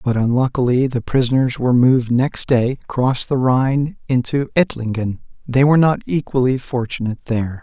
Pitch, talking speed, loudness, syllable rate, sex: 130 Hz, 150 wpm, -17 LUFS, 5.4 syllables/s, male